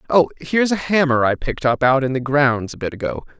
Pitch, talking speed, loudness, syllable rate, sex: 140 Hz, 245 wpm, -18 LUFS, 6.0 syllables/s, male